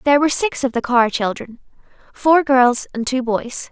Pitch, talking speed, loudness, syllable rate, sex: 260 Hz, 180 wpm, -17 LUFS, 4.9 syllables/s, female